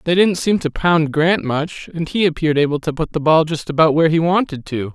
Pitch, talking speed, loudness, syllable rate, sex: 160 Hz, 255 wpm, -17 LUFS, 5.6 syllables/s, male